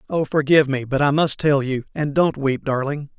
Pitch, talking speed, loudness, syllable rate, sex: 140 Hz, 205 wpm, -20 LUFS, 5.3 syllables/s, male